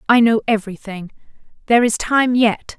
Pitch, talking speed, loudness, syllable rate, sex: 225 Hz, 150 wpm, -16 LUFS, 5.5 syllables/s, female